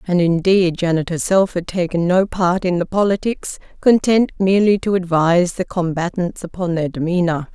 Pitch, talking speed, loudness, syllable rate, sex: 180 Hz, 160 wpm, -17 LUFS, 5.1 syllables/s, female